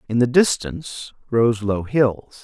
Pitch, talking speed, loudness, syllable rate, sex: 115 Hz, 150 wpm, -20 LUFS, 3.8 syllables/s, male